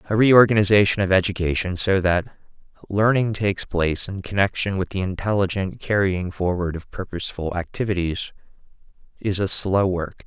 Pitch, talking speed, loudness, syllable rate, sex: 95 Hz, 135 wpm, -21 LUFS, 5.3 syllables/s, male